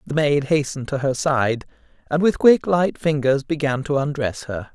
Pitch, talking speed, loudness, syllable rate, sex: 145 Hz, 190 wpm, -20 LUFS, 4.8 syllables/s, male